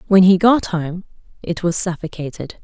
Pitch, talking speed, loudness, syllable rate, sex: 180 Hz, 160 wpm, -18 LUFS, 4.8 syllables/s, female